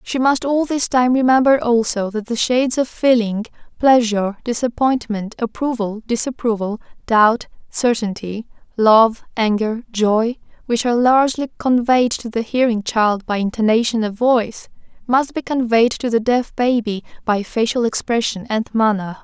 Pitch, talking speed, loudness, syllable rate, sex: 230 Hz, 140 wpm, -18 LUFS, 4.7 syllables/s, female